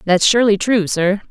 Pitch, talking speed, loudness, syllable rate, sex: 205 Hz, 185 wpm, -15 LUFS, 5.4 syllables/s, female